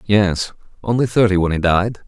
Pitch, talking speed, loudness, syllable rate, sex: 100 Hz, 175 wpm, -17 LUFS, 4.9 syllables/s, male